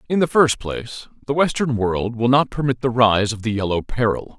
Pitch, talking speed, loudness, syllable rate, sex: 120 Hz, 220 wpm, -19 LUFS, 5.2 syllables/s, male